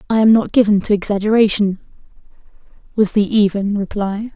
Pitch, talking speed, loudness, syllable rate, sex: 205 Hz, 140 wpm, -16 LUFS, 5.7 syllables/s, female